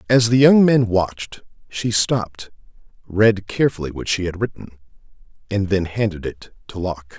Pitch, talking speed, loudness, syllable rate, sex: 100 Hz, 160 wpm, -19 LUFS, 5.0 syllables/s, male